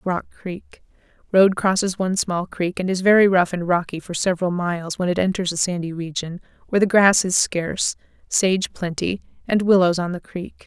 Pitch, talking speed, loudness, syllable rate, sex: 180 Hz, 185 wpm, -20 LUFS, 5.3 syllables/s, female